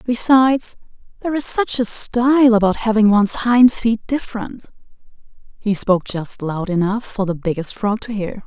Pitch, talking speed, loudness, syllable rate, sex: 220 Hz, 165 wpm, -17 LUFS, 5.0 syllables/s, female